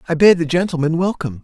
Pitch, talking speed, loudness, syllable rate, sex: 165 Hz, 210 wpm, -16 LUFS, 7.2 syllables/s, male